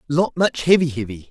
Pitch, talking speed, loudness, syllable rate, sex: 145 Hz, 185 wpm, -19 LUFS, 5.5 syllables/s, male